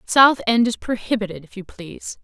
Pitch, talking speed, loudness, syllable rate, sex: 215 Hz, 190 wpm, -19 LUFS, 5.3 syllables/s, female